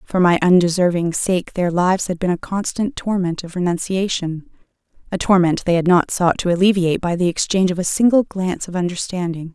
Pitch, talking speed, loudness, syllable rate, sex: 180 Hz, 180 wpm, -18 LUFS, 5.7 syllables/s, female